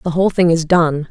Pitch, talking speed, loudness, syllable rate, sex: 165 Hz, 270 wpm, -14 LUFS, 5.9 syllables/s, female